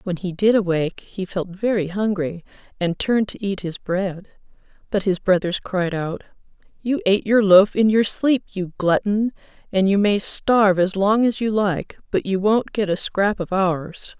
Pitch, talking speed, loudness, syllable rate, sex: 195 Hz, 190 wpm, -20 LUFS, 4.6 syllables/s, female